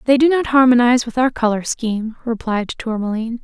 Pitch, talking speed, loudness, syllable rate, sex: 240 Hz, 175 wpm, -17 LUFS, 5.9 syllables/s, female